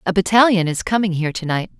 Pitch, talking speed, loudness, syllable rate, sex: 185 Hz, 235 wpm, -17 LUFS, 6.8 syllables/s, female